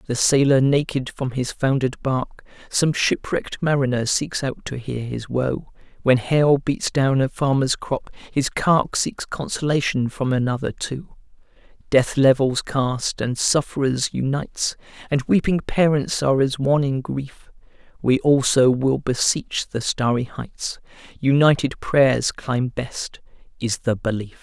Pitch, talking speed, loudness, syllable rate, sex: 135 Hz, 140 wpm, -21 LUFS, 4.2 syllables/s, male